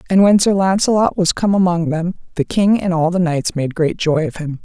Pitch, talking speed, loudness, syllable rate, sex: 185 Hz, 245 wpm, -16 LUFS, 5.2 syllables/s, female